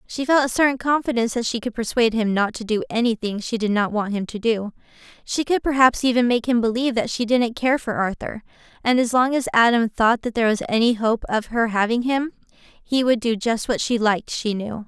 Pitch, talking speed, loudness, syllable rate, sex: 235 Hz, 230 wpm, -21 LUFS, 5.6 syllables/s, female